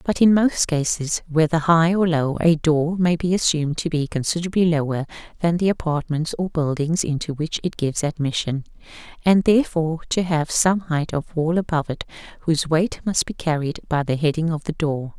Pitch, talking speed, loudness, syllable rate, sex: 160 Hz, 190 wpm, -21 LUFS, 5.4 syllables/s, female